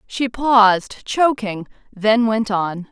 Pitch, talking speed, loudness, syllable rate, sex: 220 Hz, 125 wpm, -17 LUFS, 3.3 syllables/s, female